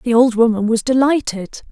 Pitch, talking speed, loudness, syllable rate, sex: 235 Hz, 175 wpm, -15 LUFS, 5.7 syllables/s, female